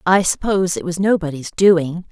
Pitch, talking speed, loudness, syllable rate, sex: 180 Hz, 170 wpm, -17 LUFS, 5.0 syllables/s, female